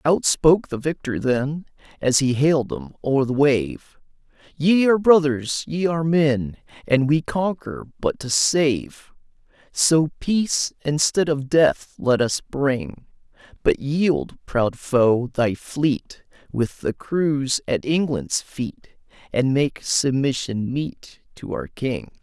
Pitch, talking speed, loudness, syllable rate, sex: 145 Hz, 140 wpm, -21 LUFS, 3.4 syllables/s, male